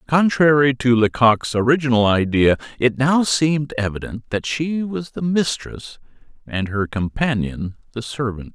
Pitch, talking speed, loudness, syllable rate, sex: 125 Hz, 135 wpm, -19 LUFS, 4.4 syllables/s, male